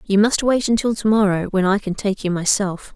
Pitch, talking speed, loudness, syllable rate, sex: 205 Hz, 245 wpm, -19 LUFS, 5.3 syllables/s, female